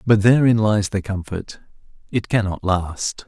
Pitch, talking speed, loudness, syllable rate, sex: 100 Hz, 130 wpm, -20 LUFS, 4.2 syllables/s, male